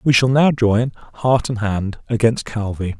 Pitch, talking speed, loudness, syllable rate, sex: 115 Hz, 180 wpm, -18 LUFS, 4.3 syllables/s, male